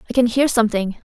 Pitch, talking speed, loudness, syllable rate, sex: 230 Hz, 215 wpm, -18 LUFS, 7.2 syllables/s, female